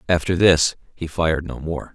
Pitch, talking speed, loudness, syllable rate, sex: 80 Hz, 185 wpm, -20 LUFS, 5.1 syllables/s, male